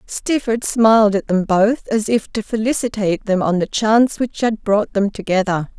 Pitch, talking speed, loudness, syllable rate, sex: 215 Hz, 185 wpm, -17 LUFS, 4.8 syllables/s, female